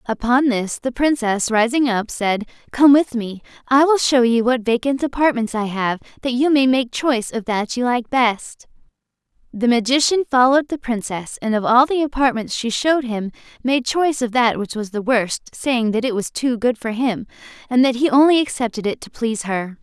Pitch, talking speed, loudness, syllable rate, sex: 245 Hz, 205 wpm, -18 LUFS, 5.0 syllables/s, female